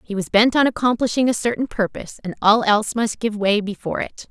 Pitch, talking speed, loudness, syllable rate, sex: 220 Hz, 225 wpm, -19 LUFS, 6.2 syllables/s, female